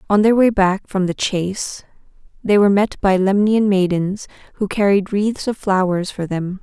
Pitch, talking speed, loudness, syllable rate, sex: 195 Hz, 180 wpm, -17 LUFS, 4.7 syllables/s, female